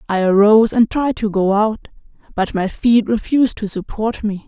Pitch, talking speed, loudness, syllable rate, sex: 215 Hz, 190 wpm, -16 LUFS, 5.0 syllables/s, female